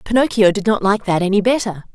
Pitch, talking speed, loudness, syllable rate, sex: 205 Hz, 245 wpm, -16 LUFS, 6.8 syllables/s, female